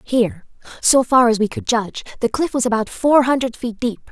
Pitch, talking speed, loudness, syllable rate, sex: 240 Hz, 220 wpm, -18 LUFS, 5.6 syllables/s, female